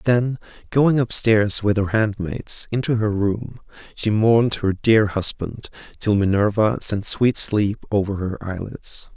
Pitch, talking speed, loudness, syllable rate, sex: 105 Hz, 145 wpm, -20 LUFS, 3.9 syllables/s, male